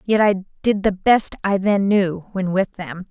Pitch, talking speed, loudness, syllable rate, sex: 195 Hz, 210 wpm, -19 LUFS, 3.8 syllables/s, female